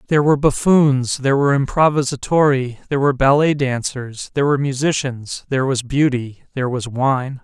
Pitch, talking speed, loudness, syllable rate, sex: 135 Hz, 155 wpm, -17 LUFS, 5.8 syllables/s, male